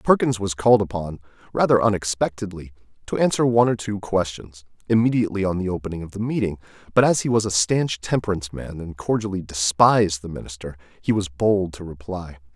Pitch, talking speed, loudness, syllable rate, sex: 95 Hz, 175 wpm, -22 LUFS, 6.0 syllables/s, male